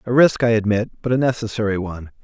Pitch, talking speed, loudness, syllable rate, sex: 110 Hz, 215 wpm, -19 LUFS, 6.8 syllables/s, male